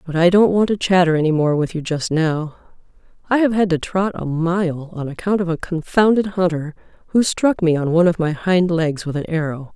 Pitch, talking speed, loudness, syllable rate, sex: 170 Hz, 230 wpm, -18 LUFS, 5.4 syllables/s, female